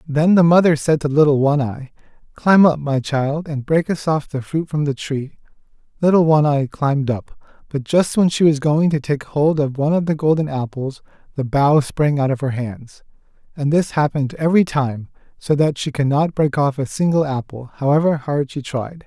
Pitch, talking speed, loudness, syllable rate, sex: 145 Hz, 210 wpm, -18 LUFS, 5.1 syllables/s, male